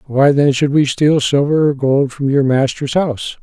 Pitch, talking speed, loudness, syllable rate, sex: 140 Hz, 210 wpm, -14 LUFS, 4.7 syllables/s, male